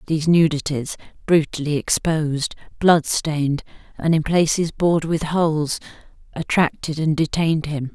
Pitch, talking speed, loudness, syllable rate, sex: 155 Hz, 115 wpm, -20 LUFS, 4.9 syllables/s, female